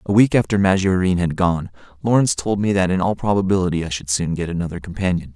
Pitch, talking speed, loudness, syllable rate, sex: 90 Hz, 215 wpm, -19 LUFS, 6.5 syllables/s, male